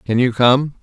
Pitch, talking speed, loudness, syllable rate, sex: 125 Hz, 220 wpm, -15 LUFS, 4.6 syllables/s, male